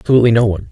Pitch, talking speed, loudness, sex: 115 Hz, 250 wpm, -13 LUFS, male